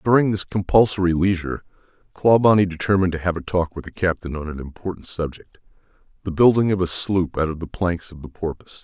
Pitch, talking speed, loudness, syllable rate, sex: 90 Hz, 190 wpm, -21 LUFS, 6.2 syllables/s, male